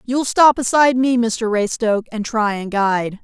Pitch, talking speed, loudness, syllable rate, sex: 230 Hz, 185 wpm, -17 LUFS, 5.1 syllables/s, female